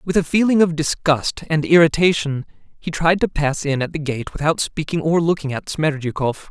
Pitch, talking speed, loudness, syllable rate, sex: 155 Hz, 195 wpm, -19 LUFS, 5.1 syllables/s, male